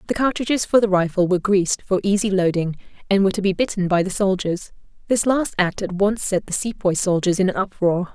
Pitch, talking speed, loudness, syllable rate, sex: 195 Hz, 220 wpm, -20 LUFS, 6.0 syllables/s, female